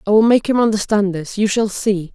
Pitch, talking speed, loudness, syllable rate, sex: 205 Hz, 250 wpm, -16 LUFS, 5.5 syllables/s, female